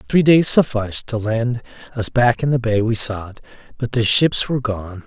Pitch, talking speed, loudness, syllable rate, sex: 115 Hz, 200 wpm, -17 LUFS, 4.7 syllables/s, male